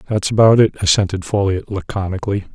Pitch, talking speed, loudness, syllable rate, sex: 95 Hz, 140 wpm, -16 LUFS, 6.0 syllables/s, male